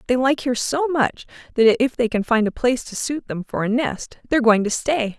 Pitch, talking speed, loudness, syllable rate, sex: 245 Hz, 255 wpm, -20 LUFS, 5.4 syllables/s, female